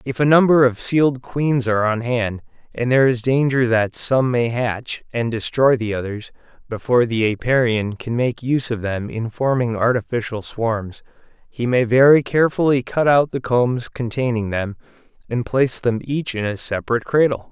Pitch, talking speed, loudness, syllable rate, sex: 120 Hz, 175 wpm, -19 LUFS, 5.0 syllables/s, male